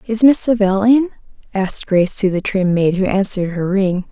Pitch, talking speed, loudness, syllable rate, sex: 200 Hz, 205 wpm, -16 LUFS, 5.4 syllables/s, female